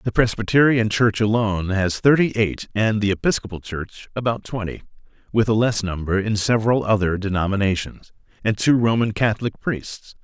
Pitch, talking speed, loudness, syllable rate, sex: 105 Hz, 150 wpm, -20 LUFS, 5.3 syllables/s, male